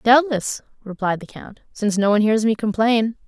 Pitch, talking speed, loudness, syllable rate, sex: 220 Hz, 185 wpm, -20 LUFS, 5.4 syllables/s, female